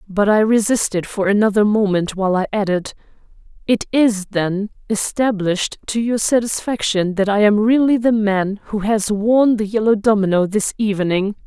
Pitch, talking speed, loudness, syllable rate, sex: 210 Hz, 155 wpm, -17 LUFS, 4.9 syllables/s, female